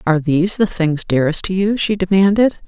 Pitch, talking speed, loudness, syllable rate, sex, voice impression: 180 Hz, 200 wpm, -16 LUFS, 5.9 syllables/s, female, feminine, adult-like, tensed, hard, clear, fluent, intellectual, calm, reassuring, elegant, lively, slightly strict, slightly sharp